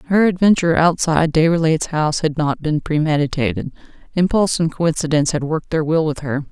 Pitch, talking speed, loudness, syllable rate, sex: 160 Hz, 165 wpm, -17 LUFS, 6.1 syllables/s, female